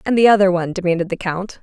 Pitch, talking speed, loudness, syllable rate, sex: 185 Hz, 260 wpm, -17 LUFS, 7.3 syllables/s, female